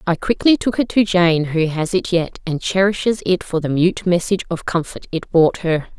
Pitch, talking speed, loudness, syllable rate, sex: 180 Hz, 220 wpm, -18 LUFS, 5.0 syllables/s, female